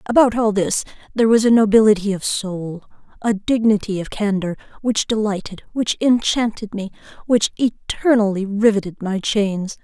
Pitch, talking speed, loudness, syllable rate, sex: 210 Hz, 115 wpm, -19 LUFS, 4.9 syllables/s, female